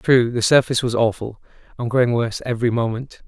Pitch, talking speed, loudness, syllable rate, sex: 120 Hz, 185 wpm, -19 LUFS, 6.3 syllables/s, male